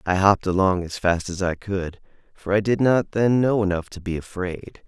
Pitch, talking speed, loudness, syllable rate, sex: 95 Hz, 220 wpm, -22 LUFS, 5.0 syllables/s, male